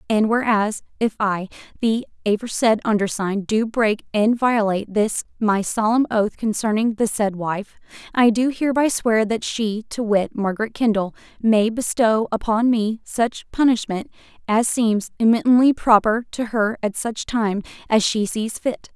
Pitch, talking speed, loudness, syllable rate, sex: 220 Hz, 150 wpm, -20 LUFS, 4.6 syllables/s, female